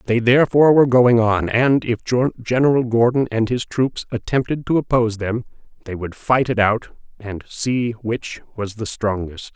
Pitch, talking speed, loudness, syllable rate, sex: 115 Hz, 170 wpm, -18 LUFS, 4.6 syllables/s, male